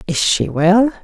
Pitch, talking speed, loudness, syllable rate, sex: 200 Hz, 175 wpm, -15 LUFS, 3.8 syllables/s, female